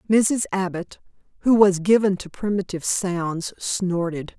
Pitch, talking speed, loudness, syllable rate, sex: 190 Hz, 125 wpm, -22 LUFS, 4.1 syllables/s, female